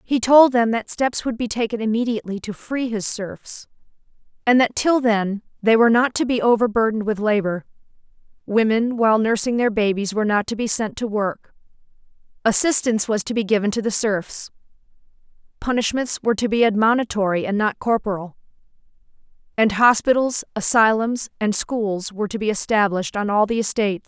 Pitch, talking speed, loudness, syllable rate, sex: 220 Hz, 160 wpm, -20 LUFS, 5.6 syllables/s, female